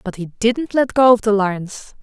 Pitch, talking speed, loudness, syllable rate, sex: 215 Hz, 235 wpm, -16 LUFS, 4.8 syllables/s, female